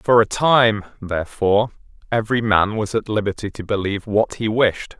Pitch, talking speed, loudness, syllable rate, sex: 105 Hz, 170 wpm, -19 LUFS, 5.3 syllables/s, male